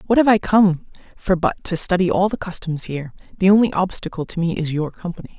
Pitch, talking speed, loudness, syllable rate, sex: 185 Hz, 225 wpm, -19 LUFS, 6.1 syllables/s, female